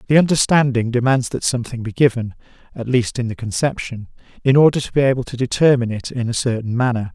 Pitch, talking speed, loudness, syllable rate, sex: 125 Hz, 200 wpm, -18 LUFS, 5.8 syllables/s, male